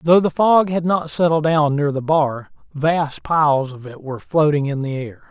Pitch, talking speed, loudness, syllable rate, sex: 150 Hz, 215 wpm, -18 LUFS, 4.7 syllables/s, male